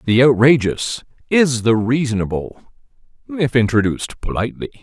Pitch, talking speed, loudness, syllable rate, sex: 125 Hz, 100 wpm, -17 LUFS, 5.1 syllables/s, male